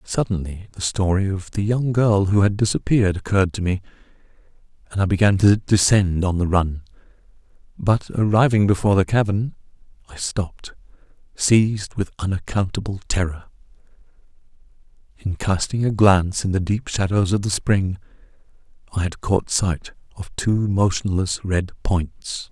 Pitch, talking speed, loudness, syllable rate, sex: 95 Hz, 140 wpm, -20 LUFS, 4.9 syllables/s, male